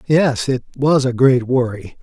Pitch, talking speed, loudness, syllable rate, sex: 130 Hz, 180 wpm, -16 LUFS, 4.0 syllables/s, male